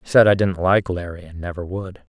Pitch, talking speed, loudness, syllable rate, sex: 90 Hz, 280 wpm, -20 LUFS, 6.1 syllables/s, male